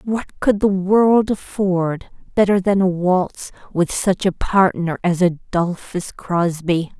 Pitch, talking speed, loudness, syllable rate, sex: 185 Hz, 135 wpm, -18 LUFS, 3.5 syllables/s, female